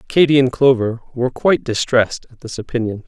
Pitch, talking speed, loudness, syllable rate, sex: 125 Hz, 175 wpm, -17 LUFS, 6.2 syllables/s, male